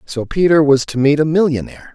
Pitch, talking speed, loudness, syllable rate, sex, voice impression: 145 Hz, 215 wpm, -14 LUFS, 6.0 syllables/s, male, masculine, adult-like, thick, tensed, powerful, hard, raspy, cool, intellectual, calm, mature, slightly friendly, wild, lively, slightly strict, slightly intense